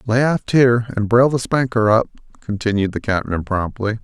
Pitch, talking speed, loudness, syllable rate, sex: 115 Hz, 180 wpm, -18 LUFS, 5.2 syllables/s, male